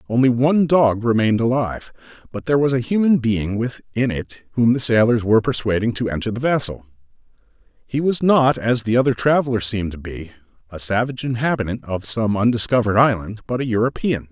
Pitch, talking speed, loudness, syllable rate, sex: 115 Hz, 175 wpm, -19 LUFS, 6.0 syllables/s, male